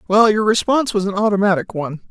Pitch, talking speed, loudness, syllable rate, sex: 205 Hz, 200 wpm, -17 LUFS, 7.0 syllables/s, female